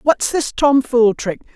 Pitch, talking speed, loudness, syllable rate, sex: 250 Hz, 155 wpm, -16 LUFS, 3.8 syllables/s, female